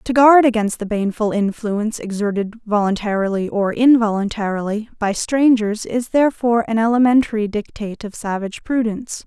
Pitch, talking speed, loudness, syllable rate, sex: 220 Hz, 130 wpm, -18 LUFS, 5.6 syllables/s, female